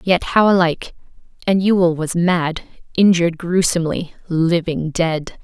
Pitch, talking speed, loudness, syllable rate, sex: 170 Hz, 120 wpm, -17 LUFS, 4.7 syllables/s, female